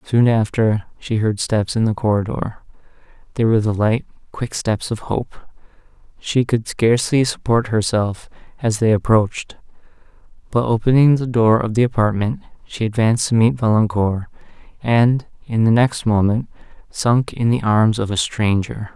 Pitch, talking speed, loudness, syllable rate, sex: 115 Hz, 150 wpm, -18 LUFS, 4.7 syllables/s, male